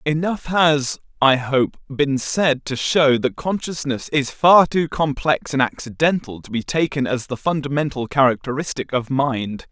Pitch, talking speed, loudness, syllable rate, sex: 140 Hz, 155 wpm, -19 LUFS, 4.3 syllables/s, male